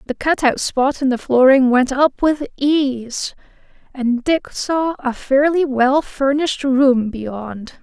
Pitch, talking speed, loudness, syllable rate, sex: 270 Hz, 155 wpm, -17 LUFS, 3.5 syllables/s, female